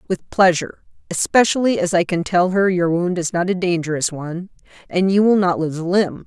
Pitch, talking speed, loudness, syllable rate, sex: 180 Hz, 210 wpm, -18 LUFS, 5.6 syllables/s, female